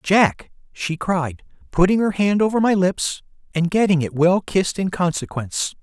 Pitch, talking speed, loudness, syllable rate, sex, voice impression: 180 Hz, 165 wpm, -20 LUFS, 4.7 syllables/s, male, adult-like, slightly middle-aged, slightly thick, tensed, slightly powerful, bright, hard, very clear, fluent, slightly raspy, intellectual, refreshing, very sincere, very calm, friendly, reassuring, very unique, slightly elegant, slightly sweet, very lively, kind, slightly intense, very sharp, slightly modest, light